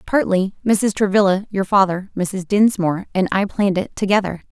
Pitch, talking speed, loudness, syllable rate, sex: 195 Hz, 160 wpm, -18 LUFS, 5.2 syllables/s, female